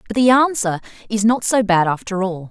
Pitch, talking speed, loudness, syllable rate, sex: 215 Hz, 215 wpm, -17 LUFS, 5.3 syllables/s, female